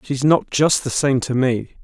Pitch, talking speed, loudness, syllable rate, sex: 135 Hz, 230 wpm, -18 LUFS, 4.4 syllables/s, male